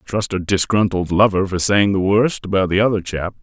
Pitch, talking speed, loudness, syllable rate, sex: 95 Hz, 210 wpm, -17 LUFS, 5.2 syllables/s, male